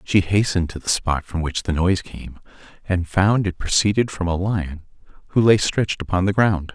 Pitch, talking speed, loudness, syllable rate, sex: 95 Hz, 205 wpm, -20 LUFS, 5.3 syllables/s, male